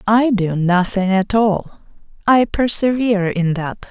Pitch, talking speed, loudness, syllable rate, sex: 205 Hz, 140 wpm, -17 LUFS, 4.1 syllables/s, female